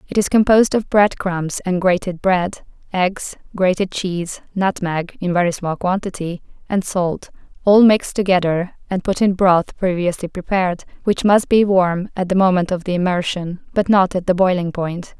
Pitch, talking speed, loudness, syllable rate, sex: 185 Hz, 175 wpm, -18 LUFS, 4.5 syllables/s, female